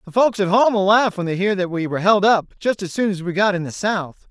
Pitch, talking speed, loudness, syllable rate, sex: 195 Hz, 305 wpm, -19 LUFS, 5.9 syllables/s, male